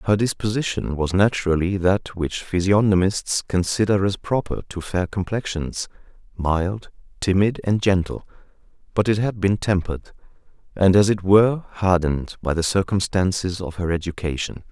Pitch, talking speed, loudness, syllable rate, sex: 95 Hz, 135 wpm, -21 LUFS, 4.8 syllables/s, male